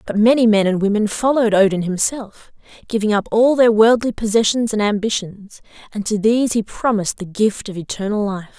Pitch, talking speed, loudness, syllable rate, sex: 215 Hz, 180 wpm, -17 LUFS, 5.6 syllables/s, female